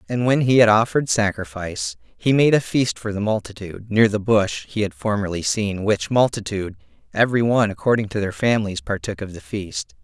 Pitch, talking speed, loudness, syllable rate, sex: 105 Hz, 190 wpm, -20 LUFS, 5.7 syllables/s, male